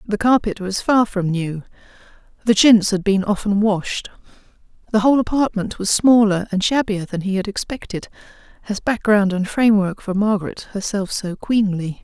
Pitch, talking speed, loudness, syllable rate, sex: 205 Hz, 170 wpm, -18 LUFS, 5.0 syllables/s, female